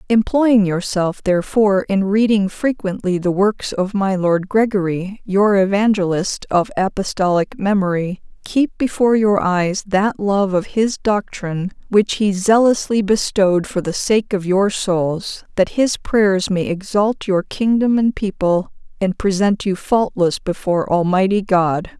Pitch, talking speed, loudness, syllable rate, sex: 195 Hz, 140 wpm, -17 LUFS, 4.2 syllables/s, female